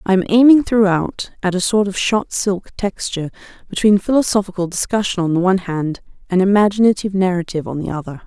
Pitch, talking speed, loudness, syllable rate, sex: 190 Hz, 175 wpm, -17 LUFS, 6.1 syllables/s, female